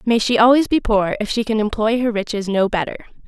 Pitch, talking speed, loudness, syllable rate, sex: 220 Hz, 240 wpm, -18 LUFS, 5.8 syllables/s, female